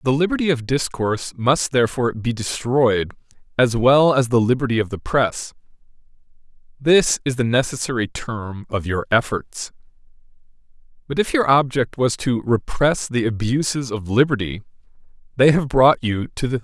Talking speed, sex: 160 wpm, male